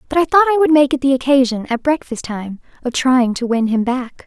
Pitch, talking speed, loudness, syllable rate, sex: 265 Hz, 255 wpm, -16 LUFS, 5.5 syllables/s, female